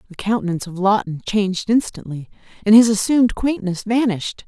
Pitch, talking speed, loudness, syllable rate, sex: 210 Hz, 145 wpm, -18 LUFS, 6.0 syllables/s, female